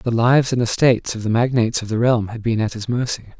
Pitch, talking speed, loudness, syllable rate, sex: 115 Hz, 265 wpm, -19 LUFS, 6.5 syllables/s, male